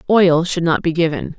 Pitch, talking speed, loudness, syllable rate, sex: 165 Hz, 215 wpm, -16 LUFS, 5.0 syllables/s, female